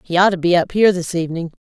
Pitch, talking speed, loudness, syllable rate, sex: 175 Hz, 295 wpm, -17 LUFS, 7.6 syllables/s, female